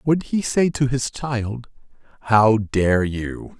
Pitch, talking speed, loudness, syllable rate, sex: 120 Hz, 150 wpm, -20 LUFS, 3.0 syllables/s, male